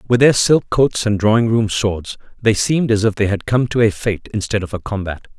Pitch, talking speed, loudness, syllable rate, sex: 110 Hz, 245 wpm, -17 LUFS, 5.6 syllables/s, male